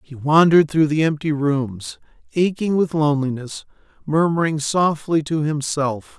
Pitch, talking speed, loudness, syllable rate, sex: 150 Hz, 125 wpm, -19 LUFS, 4.5 syllables/s, male